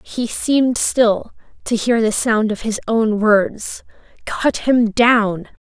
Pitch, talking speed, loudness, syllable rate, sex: 225 Hz, 150 wpm, -17 LUFS, 3.2 syllables/s, female